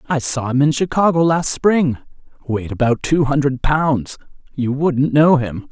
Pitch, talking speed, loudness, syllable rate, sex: 145 Hz, 145 wpm, -17 LUFS, 4.5 syllables/s, male